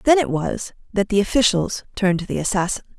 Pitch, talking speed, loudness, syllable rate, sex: 205 Hz, 200 wpm, -21 LUFS, 6.2 syllables/s, female